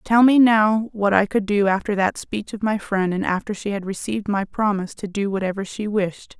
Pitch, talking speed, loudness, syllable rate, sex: 205 Hz, 235 wpm, -21 LUFS, 5.3 syllables/s, female